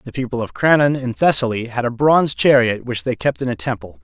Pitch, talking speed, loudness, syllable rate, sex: 125 Hz, 240 wpm, -17 LUFS, 5.9 syllables/s, male